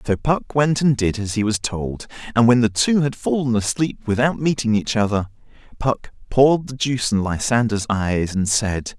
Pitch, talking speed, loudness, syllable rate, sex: 115 Hz, 195 wpm, -20 LUFS, 4.8 syllables/s, male